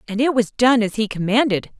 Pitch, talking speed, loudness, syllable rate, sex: 225 Hz, 235 wpm, -18 LUFS, 5.7 syllables/s, female